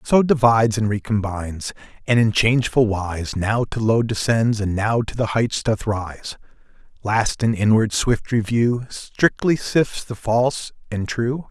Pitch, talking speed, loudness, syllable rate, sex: 110 Hz, 155 wpm, -20 LUFS, 4.1 syllables/s, male